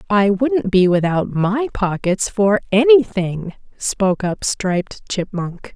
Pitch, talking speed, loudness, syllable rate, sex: 205 Hz, 135 wpm, -17 LUFS, 3.7 syllables/s, female